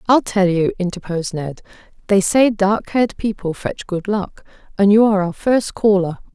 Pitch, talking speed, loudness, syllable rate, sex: 200 Hz, 180 wpm, -17 LUFS, 4.9 syllables/s, female